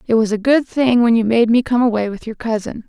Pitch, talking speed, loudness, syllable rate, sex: 230 Hz, 290 wpm, -16 LUFS, 5.9 syllables/s, female